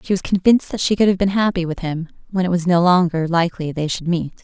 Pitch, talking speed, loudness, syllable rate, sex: 175 Hz, 270 wpm, -18 LUFS, 6.4 syllables/s, female